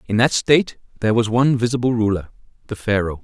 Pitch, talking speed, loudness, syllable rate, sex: 115 Hz, 165 wpm, -19 LUFS, 6.8 syllables/s, male